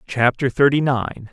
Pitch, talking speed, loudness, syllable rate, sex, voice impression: 130 Hz, 135 wpm, -18 LUFS, 4.3 syllables/s, male, masculine, slightly middle-aged, tensed, powerful, clear, fluent, slightly mature, friendly, unique, slightly wild, slightly strict